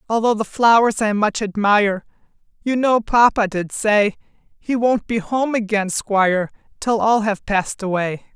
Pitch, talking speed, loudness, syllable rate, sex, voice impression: 215 Hz, 160 wpm, -18 LUFS, 4.6 syllables/s, female, very feminine, very adult-like, middle-aged, very thin, very tensed, very powerful, very bright, very hard, very clear, very fluent, slightly cool, intellectual, very refreshing, sincere, calm, slightly friendly, slightly reassuring, very unique, slightly elegant, wild, slightly sweet, lively, very strict, intense, very sharp